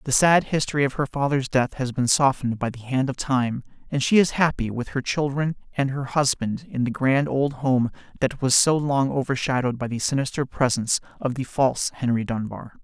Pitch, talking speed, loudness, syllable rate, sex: 135 Hz, 205 wpm, -23 LUFS, 5.4 syllables/s, male